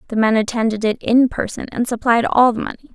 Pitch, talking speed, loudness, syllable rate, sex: 230 Hz, 225 wpm, -17 LUFS, 6.0 syllables/s, female